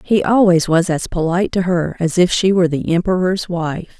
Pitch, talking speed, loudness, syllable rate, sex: 180 Hz, 210 wpm, -16 LUFS, 5.3 syllables/s, female